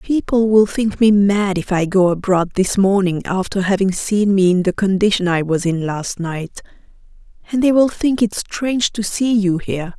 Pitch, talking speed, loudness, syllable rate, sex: 195 Hz, 200 wpm, -17 LUFS, 4.7 syllables/s, female